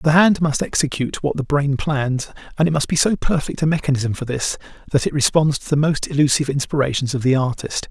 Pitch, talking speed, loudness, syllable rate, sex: 145 Hz, 220 wpm, -19 LUFS, 6.0 syllables/s, male